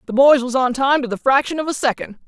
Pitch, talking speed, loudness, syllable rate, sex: 260 Hz, 290 wpm, -17 LUFS, 6.3 syllables/s, female